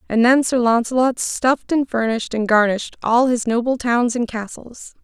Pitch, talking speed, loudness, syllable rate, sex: 240 Hz, 180 wpm, -18 LUFS, 5.1 syllables/s, female